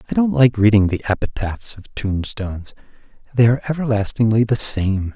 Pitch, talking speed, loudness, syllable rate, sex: 110 Hz, 150 wpm, -18 LUFS, 5.4 syllables/s, male